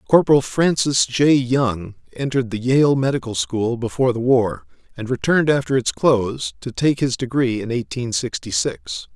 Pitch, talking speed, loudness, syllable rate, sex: 125 Hz, 165 wpm, -19 LUFS, 4.9 syllables/s, male